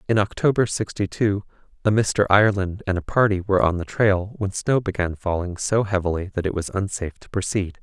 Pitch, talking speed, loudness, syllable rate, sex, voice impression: 100 Hz, 200 wpm, -22 LUFS, 5.6 syllables/s, male, masculine, adult-like, tensed, fluent, cool, intellectual, calm, friendly, wild, kind, modest